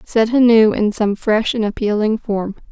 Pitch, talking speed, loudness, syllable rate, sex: 215 Hz, 175 wpm, -16 LUFS, 4.4 syllables/s, female